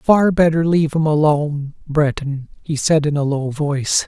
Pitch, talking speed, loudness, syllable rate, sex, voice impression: 150 Hz, 175 wpm, -17 LUFS, 4.8 syllables/s, male, masculine, adult-like, relaxed, weak, dark, soft, muffled, raspy, calm, slightly unique, modest